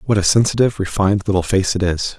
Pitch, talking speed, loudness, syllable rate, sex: 100 Hz, 220 wpm, -17 LUFS, 6.6 syllables/s, male